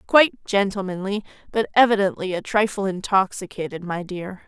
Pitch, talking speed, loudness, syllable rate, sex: 195 Hz, 120 wpm, -22 LUFS, 5.5 syllables/s, female